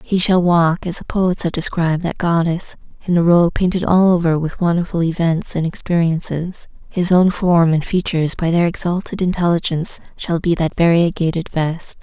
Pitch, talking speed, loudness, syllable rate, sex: 170 Hz, 170 wpm, -17 LUFS, 5.1 syllables/s, female